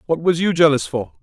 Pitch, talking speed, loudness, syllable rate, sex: 155 Hz, 245 wpm, -17 LUFS, 6.1 syllables/s, male